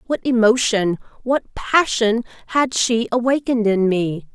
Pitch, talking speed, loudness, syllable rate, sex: 230 Hz, 125 wpm, -19 LUFS, 4.2 syllables/s, female